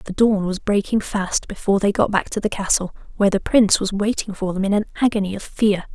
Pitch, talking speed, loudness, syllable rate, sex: 200 Hz, 240 wpm, -20 LUFS, 6.1 syllables/s, female